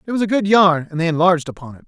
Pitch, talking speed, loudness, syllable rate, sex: 175 Hz, 320 wpm, -16 LUFS, 7.8 syllables/s, male